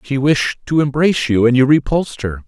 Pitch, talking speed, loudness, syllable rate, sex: 135 Hz, 220 wpm, -15 LUFS, 5.6 syllables/s, male